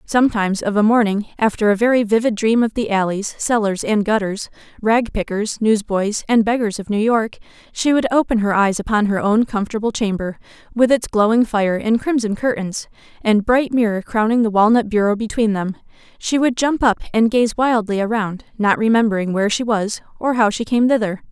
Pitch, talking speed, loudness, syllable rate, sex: 220 Hz, 185 wpm, -18 LUFS, 5.4 syllables/s, female